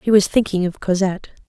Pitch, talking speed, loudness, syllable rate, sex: 190 Hz, 205 wpm, -19 LUFS, 6.5 syllables/s, female